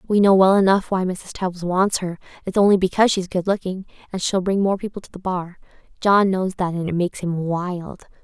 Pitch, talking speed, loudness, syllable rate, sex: 185 Hz, 225 wpm, -20 LUFS, 5.2 syllables/s, female